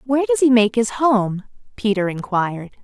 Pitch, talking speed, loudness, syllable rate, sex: 215 Hz, 170 wpm, -18 LUFS, 5.1 syllables/s, female